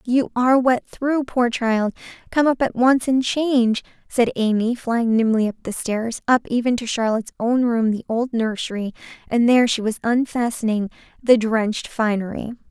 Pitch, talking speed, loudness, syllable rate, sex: 235 Hz, 165 wpm, -20 LUFS, 4.9 syllables/s, female